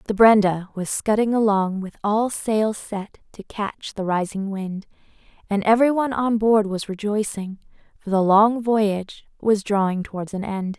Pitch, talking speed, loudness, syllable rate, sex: 205 Hz, 160 wpm, -21 LUFS, 4.4 syllables/s, female